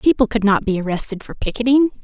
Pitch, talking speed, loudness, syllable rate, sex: 225 Hz, 205 wpm, -18 LUFS, 6.6 syllables/s, female